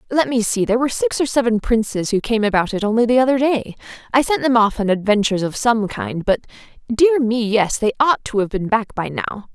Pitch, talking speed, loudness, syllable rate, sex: 225 Hz, 235 wpm, -18 LUFS, 5.9 syllables/s, female